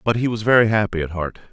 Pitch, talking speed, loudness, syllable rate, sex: 105 Hz, 275 wpm, -19 LUFS, 6.8 syllables/s, male